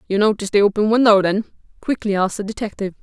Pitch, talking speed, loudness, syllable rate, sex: 205 Hz, 200 wpm, -18 LUFS, 7.8 syllables/s, female